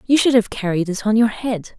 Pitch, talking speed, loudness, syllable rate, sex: 220 Hz, 270 wpm, -18 LUFS, 5.4 syllables/s, female